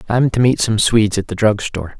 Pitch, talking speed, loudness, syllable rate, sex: 110 Hz, 270 wpm, -16 LUFS, 6.1 syllables/s, male